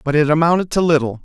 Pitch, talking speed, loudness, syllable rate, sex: 155 Hz, 240 wpm, -16 LUFS, 7.1 syllables/s, male